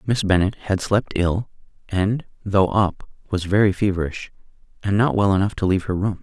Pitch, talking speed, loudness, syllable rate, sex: 100 Hz, 185 wpm, -21 LUFS, 5.2 syllables/s, male